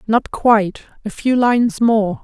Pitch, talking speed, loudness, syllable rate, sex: 225 Hz, 160 wpm, -16 LUFS, 4.3 syllables/s, female